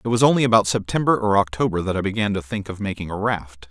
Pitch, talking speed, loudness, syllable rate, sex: 105 Hz, 260 wpm, -21 LUFS, 6.7 syllables/s, male